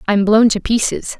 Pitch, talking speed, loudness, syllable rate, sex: 215 Hz, 200 wpm, -14 LUFS, 4.9 syllables/s, female